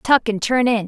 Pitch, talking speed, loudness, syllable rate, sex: 230 Hz, 275 wpm, -18 LUFS, 4.6 syllables/s, female